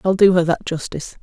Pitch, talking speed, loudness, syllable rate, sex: 175 Hz, 245 wpm, -17 LUFS, 6.5 syllables/s, female